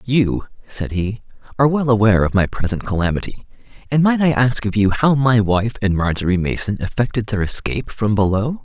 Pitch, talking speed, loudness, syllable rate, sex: 110 Hz, 190 wpm, -18 LUFS, 5.6 syllables/s, male